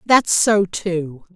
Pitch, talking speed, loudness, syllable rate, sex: 185 Hz, 130 wpm, -17 LUFS, 2.5 syllables/s, female